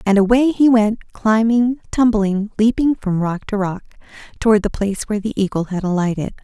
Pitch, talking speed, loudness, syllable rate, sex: 215 Hz, 175 wpm, -17 LUFS, 5.3 syllables/s, female